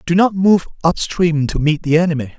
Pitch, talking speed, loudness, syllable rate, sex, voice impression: 165 Hz, 225 wpm, -16 LUFS, 5.2 syllables/s, male, masculine, adult-like, clear, slightly refreshing, sincere, slightly sweet